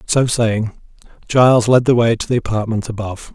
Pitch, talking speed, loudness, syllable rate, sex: 115 Hz, 180 wpm, -16 LUFS, 5.5 syllables/s, male